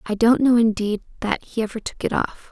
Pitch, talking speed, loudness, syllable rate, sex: 225 Hz, 240 wpm, -21 LUFS, 5.5 syllables/s, female